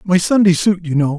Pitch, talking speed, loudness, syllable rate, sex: 175 Hz, 255 wpm, -14 LUFS, 5.7 syllables/s, male